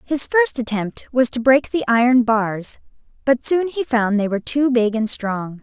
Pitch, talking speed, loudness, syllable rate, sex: 245 Hz, 205 wpm, -18 LUFS, 4.4 syllables/s, female